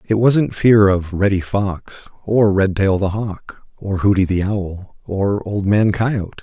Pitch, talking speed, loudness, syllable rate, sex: 100 Hz, 170 wpm, -17 LUFS, 3.8 syllables/s, male